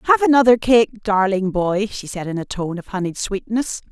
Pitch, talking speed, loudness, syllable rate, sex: 210 Hz, 200 wpm, -19 LUFS, 5.2 syllables/s, female